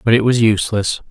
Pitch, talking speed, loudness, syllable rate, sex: 110 Hz, 220 wpm, -15 LUFS, 6.3 syllables/s, male